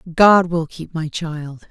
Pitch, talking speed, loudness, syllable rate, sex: 165 Hz, 175 wpm, -18 LUFS, 3.6 syllables/s, female